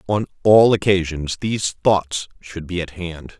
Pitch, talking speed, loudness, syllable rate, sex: 90 Hz, 160 wpm, -19 LUFS, 4.2 syllables/s, male